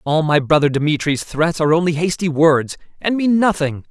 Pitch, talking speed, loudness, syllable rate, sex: 160 Hz, 185 wpm, -17 LUFS, 5.1 syllables/s, male